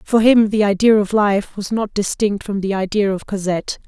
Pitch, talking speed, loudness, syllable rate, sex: 205 Hz, 215 wpm, -17 LUFS, 5.1 syllables/s, female